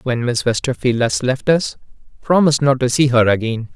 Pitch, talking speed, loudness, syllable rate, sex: 130 Hz, 190 wpm, -16 LUFS, 5.4 syllables/s, male